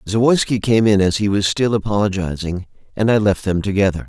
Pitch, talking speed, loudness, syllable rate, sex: 105 Hz, 190 wpm, -17 LUFS, 5.7 syllables/s, male